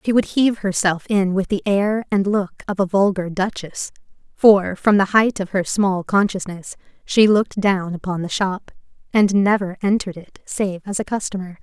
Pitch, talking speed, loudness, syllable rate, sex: 195 Hz, 185 wpm, -19 LUFS, 4.9 syllables/s, female